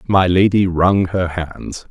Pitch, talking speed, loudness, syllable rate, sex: 90 Hz, 155 wpm, -16 LUFS, 3.4 syllables/s, male